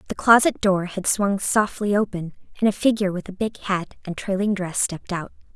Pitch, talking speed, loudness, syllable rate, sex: 195 Hz, 205 wpm, -22 LUFS, 5.4 syllables/s, female